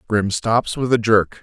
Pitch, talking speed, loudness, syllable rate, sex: 110 Hz, 210 wpm, -18 LUFS, 3.9 syllables/s, male